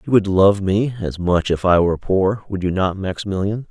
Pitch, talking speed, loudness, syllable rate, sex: 95 Hz, 225 wpm, -18 LUFS, 5.2 syllables/s, male